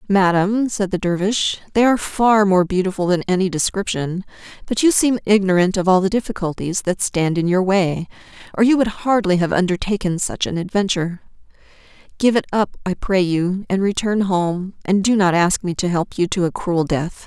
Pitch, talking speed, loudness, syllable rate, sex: 190 Hz, 190 wpm, -18 LUFS, 5.2 syllables/s, female